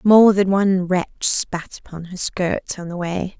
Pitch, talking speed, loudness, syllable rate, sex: 185 Hz, 195 wpm, -19 LUFS, 4.2 syllables/s, female